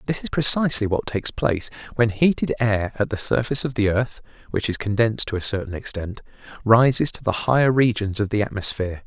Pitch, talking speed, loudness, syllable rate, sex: 110 Hz, 200 wpm, -21 LUFS, 5.1 syllables/s, male